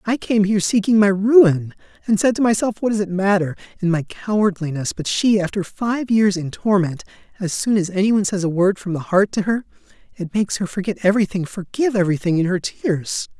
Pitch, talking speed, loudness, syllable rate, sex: 195 Hz, 205 wpm, -19 LUFS, 5.8 syllables/s, male